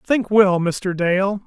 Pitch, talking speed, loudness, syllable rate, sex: 195 Hz, 165 wpm, -18 LUFS, 3.1 syllables/s, male